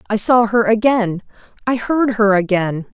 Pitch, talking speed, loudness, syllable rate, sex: 220 Hz, 160 wpm, -16 LUFS, 4.4 syllables/s, female